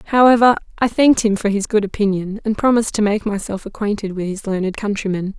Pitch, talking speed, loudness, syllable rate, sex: 210 Hz, 200 wpm, -18 LUFS, 6.1 syllables/s, female